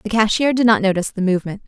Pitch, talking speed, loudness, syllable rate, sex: 205 Hz, 250 wpm, -17 LUFS, 7.7 syllables/s, female